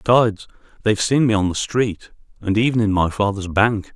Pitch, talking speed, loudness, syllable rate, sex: 105 Hz, 195 wpm, -19 LUFS, 5.7 syllables/s, male